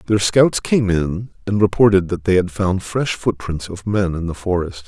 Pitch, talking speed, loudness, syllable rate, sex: 95 Hz, 210 wpm, -18 LUFS, 4.7 syllables/s, male